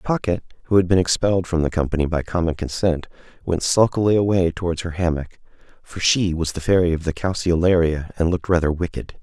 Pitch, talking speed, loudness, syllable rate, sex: 85 Hz, 190 wpm, -20 LUFS, 5.9 syllables/s, male